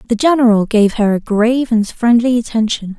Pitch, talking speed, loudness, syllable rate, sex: 230 Hz, 180 wpm, -14 LUFS, 5.4 syllables/s, female